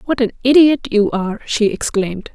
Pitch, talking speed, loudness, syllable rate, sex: 230 Hz, 180 wpm, -15 LUFS, 5.6 syllables/s, female